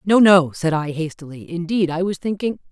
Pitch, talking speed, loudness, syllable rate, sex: 175 Hz, 200 wpm, -19 LUFS, 5.3 syllables/s, female